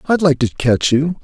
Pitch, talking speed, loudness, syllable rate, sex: 145 Hz, 245 wpm, -15 LUFS, 4.6 syllables/s, male